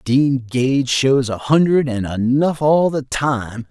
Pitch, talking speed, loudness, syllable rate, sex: 135 Hz, 160 wpm, -17 LUFS, 3.5 syllables/s, male